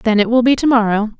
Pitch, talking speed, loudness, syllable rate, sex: 230 Hz, 300 wpm, -14 LUFS, 6.4 syllables/s, female